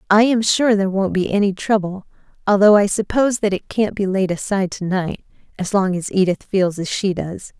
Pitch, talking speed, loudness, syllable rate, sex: 195 Hz, 215 wpm, -18 LUFS, 5.4 syllables/s, female